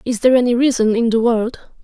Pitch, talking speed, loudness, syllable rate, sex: 235 Hz, 230 wpm, -16 LUFS, 6.6 syllables/s, female